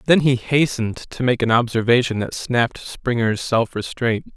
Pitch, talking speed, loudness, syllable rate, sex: 120 Hz, 165 wpm, -20 LUFS, 4.8 syllables/s, male